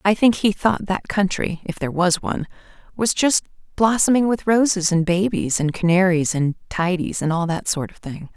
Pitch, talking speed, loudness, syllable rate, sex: 185 Hz, 180 wpm, -20 LUFS, 5.1 syllables/s, female